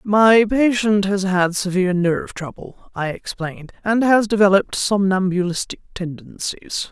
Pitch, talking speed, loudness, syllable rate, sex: 195 Hz, 120 wpm, -18 LUFS, 4.7 syllables/s, female